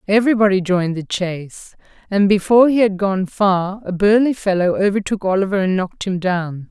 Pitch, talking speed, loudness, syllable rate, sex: 195 Hz, 170 wpm, -17 LUFS, 5.5 syllables/s, female